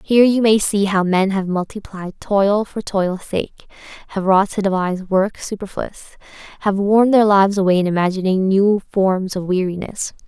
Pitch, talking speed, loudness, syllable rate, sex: 195 Hz, 170 wpm, -17 LUFS, 4.9 syllables/s, female